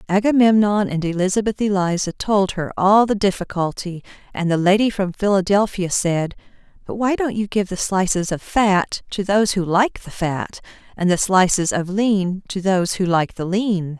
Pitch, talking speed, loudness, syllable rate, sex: 190 Hz, 175 wpm, -19 LUFS, 4.8 syllables/s, female